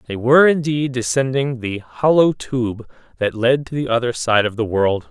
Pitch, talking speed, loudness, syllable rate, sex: 125 Hz, 190 wpm, -18 LUFS, 4.8 syllables/s, male